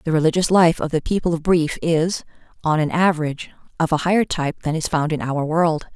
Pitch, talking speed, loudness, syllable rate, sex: 160 Hz, 220 wpm, -20 LUFS, 5.9 syllables/s, female